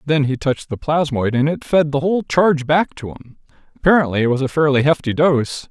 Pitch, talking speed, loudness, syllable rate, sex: 145 Hz, 220 wpm, -17 LUFS, 5.7 syllables/s, male